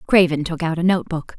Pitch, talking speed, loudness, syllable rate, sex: 170 Hz, 260 wpm, -19 LUFS, 5.7 syllables/s, female